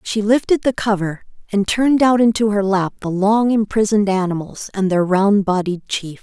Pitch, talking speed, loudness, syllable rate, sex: 205 Hz, 185 wpm, -17 LUFS, 5.0 syllables/s, female